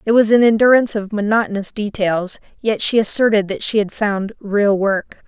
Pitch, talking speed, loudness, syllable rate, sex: 210 Hz, 180 wpm, -17 LUFS, 5.1 syllables/s, female